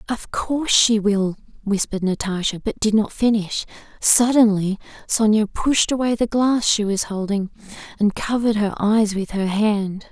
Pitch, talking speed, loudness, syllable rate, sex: 210 Hz, 155 wpm, -19 LUFS, 4.6 syllables/s, female